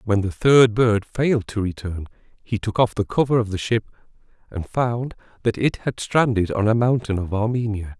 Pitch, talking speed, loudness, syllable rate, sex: 110 Hz, 195 wpm, -21 LUFS, 5.0 syllables/s, male